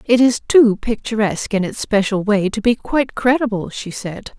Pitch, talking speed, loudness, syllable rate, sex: 220 Hz, 190 wpm, -17 LUFS, 5.1 syllables/s, female